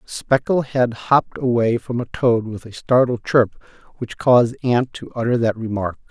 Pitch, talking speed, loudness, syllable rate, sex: 120 Hz, 175 wpm, -19 LUFS, 4.7 syllables/s, male